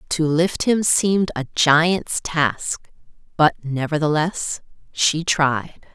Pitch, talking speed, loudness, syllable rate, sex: 155 Hz, 110 wpm, -19 LUFS, 3.1 syllables/s, female